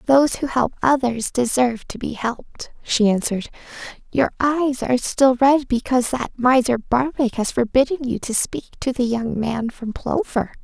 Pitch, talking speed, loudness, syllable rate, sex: 250 Hz, 170 wpm, -20 LUFS, 4.8 syllables/s, female